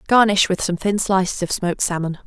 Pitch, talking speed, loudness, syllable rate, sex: 190 Hz, 210 wpm, -19 LUFS, 5.9 syllables/s, female